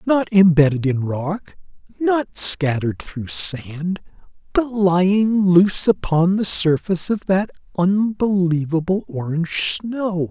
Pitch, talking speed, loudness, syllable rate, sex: 180 Hz, 110 wpm, -19 LUFS, 3.8 syllables/s, male